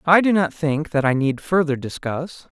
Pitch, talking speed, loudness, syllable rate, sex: 155 Hz, 210 wpm, -20 LUFS, 4.6 syllables/s, male